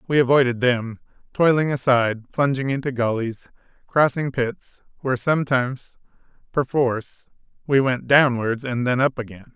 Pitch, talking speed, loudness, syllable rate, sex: 130 Hz, 125 wpm, -21 LUFS, 4.9 syllables/s, male